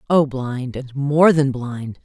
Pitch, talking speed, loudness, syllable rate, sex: 135 Hz, 175 wpm, -19 LUFS, 3.3 syllables/s, female